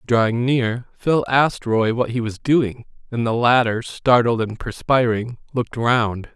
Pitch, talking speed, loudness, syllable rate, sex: 120 Hz, 160 wpm, -20 LUFS, 4.1 syllables/s, male